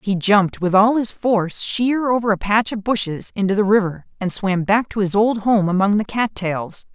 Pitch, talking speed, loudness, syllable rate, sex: 205 Hz, 225 wpm, -18 LUFS, 5.0 syllables/s, female